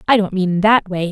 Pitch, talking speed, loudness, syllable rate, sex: 195 Hz, 270 wpm, -15 LUFS, 5.3 syllables/s, female